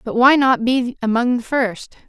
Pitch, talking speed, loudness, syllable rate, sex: 245 Hz, 200 wpm, -17 LUFS, 4.4 syllables/s, female